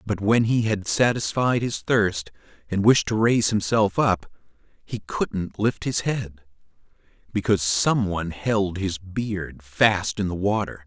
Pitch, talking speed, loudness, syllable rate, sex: 100 Hz, 150 wpm, -23 LUFS, 4.0 syllables/s, male